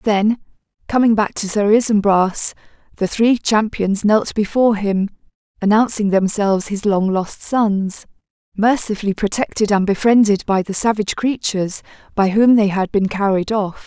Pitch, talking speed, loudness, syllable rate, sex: 205 Hz, 145 wpm, -17 LUFS, 4.8 syllables/s, female